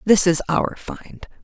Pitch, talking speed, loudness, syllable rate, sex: 185 Hz, 165 wpm, -19 LUFS, 3.6 syllables/s, female